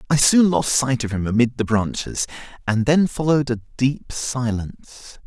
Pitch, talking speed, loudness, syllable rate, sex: 125 Hz, 170 wpm, -20 LUFS, 4.7 syllables/s, male